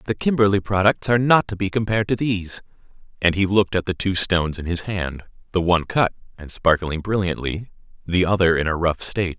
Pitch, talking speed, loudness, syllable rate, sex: 95 Hz, 200 wpm, -21 LUFS, 6.0 syllables/s, male